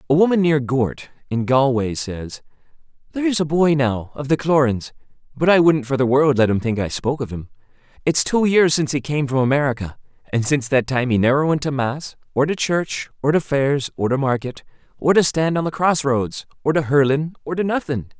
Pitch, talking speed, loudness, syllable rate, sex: 140 Hz, 220 wpm, -19 LUFS, 5.5 syllables/s, male